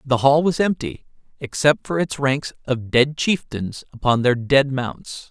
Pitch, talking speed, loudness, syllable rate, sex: 140 Hz, 170 wpm, -20 LUFS, 4.1 syllables/s, male